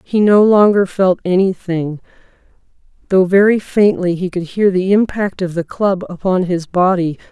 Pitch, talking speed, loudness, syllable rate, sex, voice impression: 185 Hz, 155 wpm, -14 LUFS, 4.6 syllables/s, female, feminine, adult-like, slightly fluent, intellectual, slightly strict